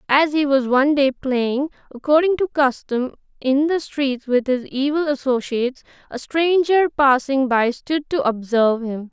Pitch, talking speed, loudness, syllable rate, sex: 275 Hz, 160 wpm, -19 LUFS, 4.5 syllables/s, female